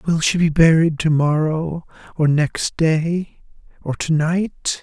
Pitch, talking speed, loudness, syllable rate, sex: 160 Hz, 150 wpm, -18 LUFS, 3.4 syllables/s, male